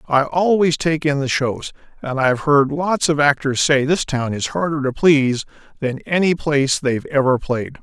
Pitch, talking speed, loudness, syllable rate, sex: 145 Hz, 190 wpm, -18 LUFS, 4.7 syllables/s, male